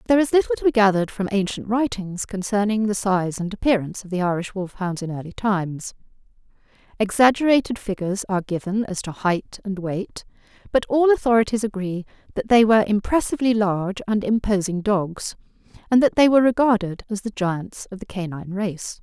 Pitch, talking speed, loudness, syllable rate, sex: 205 Hz, 170 wpm, -21 LUFS, 5.8 syllables/s, female